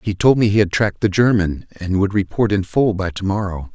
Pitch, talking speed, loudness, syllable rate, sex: 100 Hz, 255 wpm, -18 LUFS, 5.6 syllables/s, male